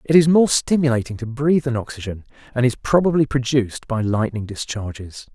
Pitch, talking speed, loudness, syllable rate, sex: 125 Hz, 170 wpm, -20 LUFS, 5.7 syllables/s, male